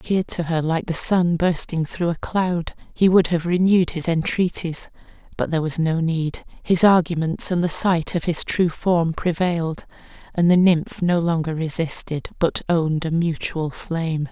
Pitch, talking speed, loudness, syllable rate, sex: 170 Hz, 180 wpm, -20 LUFS, 4.8 syllables/s, female